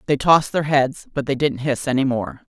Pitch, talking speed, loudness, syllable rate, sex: 135 Hz, 235 wpm, -19 LUFS, 5.4 syllables/s, female